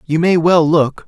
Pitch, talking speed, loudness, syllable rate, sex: 160 Hz, 225 wpm, -13 LUFS, 4.2 syllables/s, male